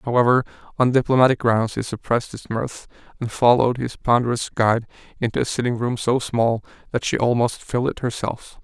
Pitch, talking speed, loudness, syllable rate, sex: 120 Hz, 175 wpm, -21 LUFS, 5.8 syllables/s, male